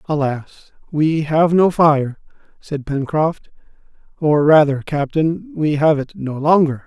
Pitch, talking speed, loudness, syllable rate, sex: 150 Hz, 130 wpm, -17 LUFS, 3.9 syllables/s, male